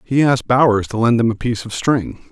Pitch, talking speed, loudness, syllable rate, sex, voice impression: 120 Hz, 260 wpm, -17 LUFS, 6.1 syllables/s, male, very masculine, very adult-like, old, very thick, relaxed, slightly weak, dark, slightly hard, slightly muffled, slightly fluent, slightly cool, intellectual, sincere, very calm, very mature, friendly, very reassuring, slightly unique, slightly elegant, wild, slightly sweet, very kind, very modest